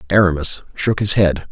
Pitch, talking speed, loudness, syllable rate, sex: 90 Hz, 160 wpm, -16 LUFS, 5.0 syllables/s, male